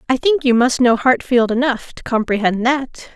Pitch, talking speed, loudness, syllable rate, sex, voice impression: 250 Hz, 190 wpm, -16 LUFS, 4.8 syllables/s, female, feminine, adult-like, tensed, powerful, bright, clear, intellectual, friendly, lively, slightly sharp